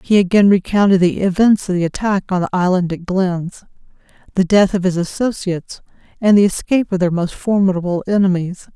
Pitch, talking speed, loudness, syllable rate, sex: 190 Hz, 180 wpm, -16 LUFS, 5.6 syllables/s, female